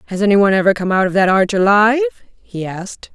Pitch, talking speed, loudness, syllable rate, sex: 205 Hz, 210 wpm, -14 LUFS, 6.3 syllables/s, female